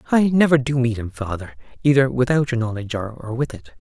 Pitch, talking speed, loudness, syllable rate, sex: 125 Hz, 200 wpm, -20 LUFS, 5.8 syllables/s, male